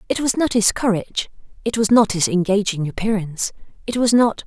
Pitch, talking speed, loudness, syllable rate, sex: 210 Hz, 190 wpm, -19 LUFS, 5.9 syllables/s, female